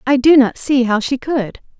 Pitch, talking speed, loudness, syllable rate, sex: 255 Hz, 235 wpm, -14 LUFS, 4.6 syllables/s, female